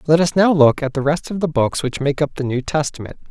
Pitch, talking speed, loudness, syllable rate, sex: 145 Hz, 290 wpm, -18 LUFS, 6.0 syllables/s, male